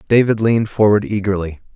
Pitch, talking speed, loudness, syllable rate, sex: 105 Hz, 135 wpm, -16 LUFS, 6.2 syllables/s, male